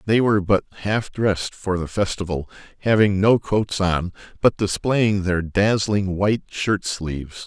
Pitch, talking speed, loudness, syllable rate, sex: 100 Hz, 155 wpm, -21 LUFS, 4.4 syllables/s, male